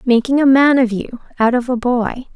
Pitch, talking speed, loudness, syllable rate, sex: 250 Hz, 230 wpm, -15 LUFS, 5.0 syllables/s, female